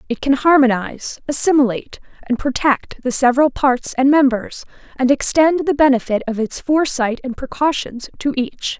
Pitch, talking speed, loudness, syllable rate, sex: 265 Hz, 150 wpm, -17 LUFS, 5.2 syllables/s, female